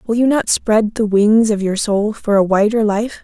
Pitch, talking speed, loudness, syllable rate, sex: 215 Hz, 240 wpm, -15 LUFS, 4.5 syllables/s, female